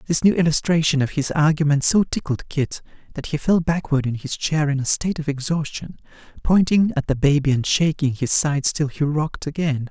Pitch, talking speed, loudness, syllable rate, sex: 150 Hz, 200 wpm, -20 LUFS, 5.5 syllables/s, male